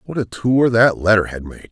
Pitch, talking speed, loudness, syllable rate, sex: 110 Hz, 245 wpm, -16 LUFS, 5.2 syllables/s, male